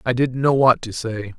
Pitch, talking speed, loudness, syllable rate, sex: 125 Hz, 260 wpm, -19 LUFS, 4.7 syllables/s, male